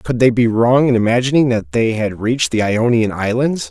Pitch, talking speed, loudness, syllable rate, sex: 120 Hz, 210 wpm, -15 LUFS, 5.2 syllables/s, male